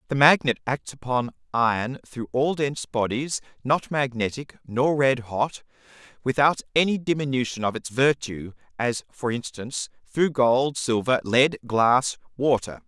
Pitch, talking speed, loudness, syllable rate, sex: 130 Hz, 135 wpm, -24 LUFS, 4.4 syllables/s, male